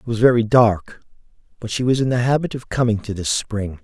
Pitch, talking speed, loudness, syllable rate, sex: 115 Hz, 235 wpm, -19 LUFS, 5.6 syllables/s, male